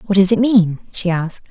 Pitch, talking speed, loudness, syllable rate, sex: 190 Hz, 240 wpm, -16 LUFS, 5.2 syllables/s, female